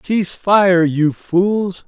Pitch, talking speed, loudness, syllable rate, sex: 185 Hz, 130 wpm, -15 LUFS, 2.8 syllables/s, male